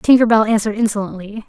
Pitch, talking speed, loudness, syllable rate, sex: 215 Hz, 160 wpm, -16 LUFS, 7.0 syllables/s, female